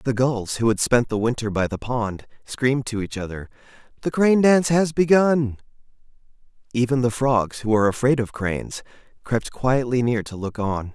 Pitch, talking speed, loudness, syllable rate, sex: 120 Hz, 180 wpm, -21 LUFS, 5.1 syllables/s, male